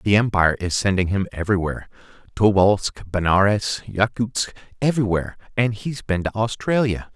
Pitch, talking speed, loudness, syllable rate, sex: 105 Hz, 115 wpm, -21 LUFS, 5.3 syllables/s, male